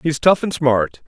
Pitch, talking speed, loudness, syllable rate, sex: 140 Hz, 225 wpm, -17 LUFS, 3.9 syllables/s, male